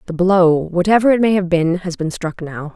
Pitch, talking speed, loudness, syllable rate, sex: 180 Hz, 195 wpm, -16 LUFS, 5.0 syllables/s, female